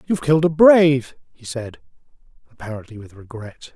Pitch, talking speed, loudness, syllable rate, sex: 135 Hz, 145 wpm, -16 LUFS, 5.8 syllables/s, male